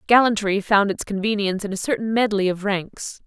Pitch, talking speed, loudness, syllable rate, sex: 205 Hz, 185 wpm, -21 LUFS, 5.5 syllables/s, female